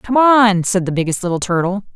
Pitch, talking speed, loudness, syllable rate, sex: 200 Hz, 215 wpm, -15 LUFS, 5.5 syllables/s, female